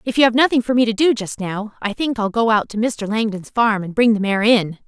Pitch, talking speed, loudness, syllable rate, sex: 220 Hz, 295 wpm, -18 LUFS, 5.6 syllables/s, female